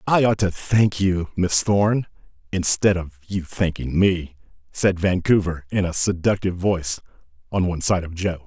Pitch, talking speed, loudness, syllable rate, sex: 90 Hz, 165 wpm, -21 LUFS, 4.7 syllables/s, male